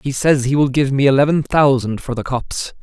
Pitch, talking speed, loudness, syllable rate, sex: 135 Hz, 235 wpm, -16 LUFS, 5.5 syllables/s, male